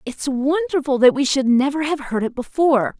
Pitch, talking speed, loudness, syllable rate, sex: 275 Hz, 200 wpm, -19 LUFS, 5.2 syllables/s, female